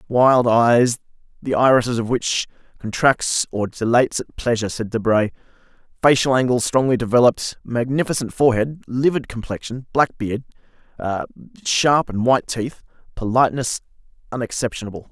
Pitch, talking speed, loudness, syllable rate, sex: 120 Hz, 115 wpm, -19 LUFS, 5.2 syllables/s, male